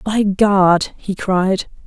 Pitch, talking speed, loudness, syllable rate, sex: 195 Hz, 130 wpm, -16 LUFS, 2.6 syllables/s, female